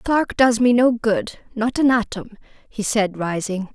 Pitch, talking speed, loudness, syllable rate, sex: 225 Hz, 160 wpm, -19 LUFS, 4.5 syllables/s, female